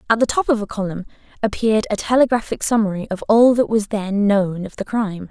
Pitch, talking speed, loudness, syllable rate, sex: 215 Hz, 215 wpm, -19 LUFS, 6.0 syllables/s, female